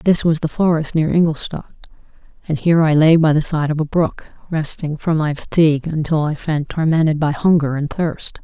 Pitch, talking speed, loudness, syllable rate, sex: 155 Hz, 200 wpm, -17 LUFS, 5.3 syllables/s, female